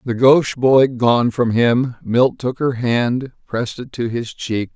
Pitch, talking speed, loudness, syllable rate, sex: 120 Hz, 190 wpm, -17 LUFS, 3.9 syllables/s, male